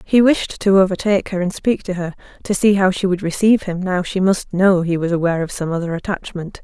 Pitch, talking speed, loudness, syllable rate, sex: 185 Hz, 245 wpm, -18 LUFS, 5.9 syllables/s, female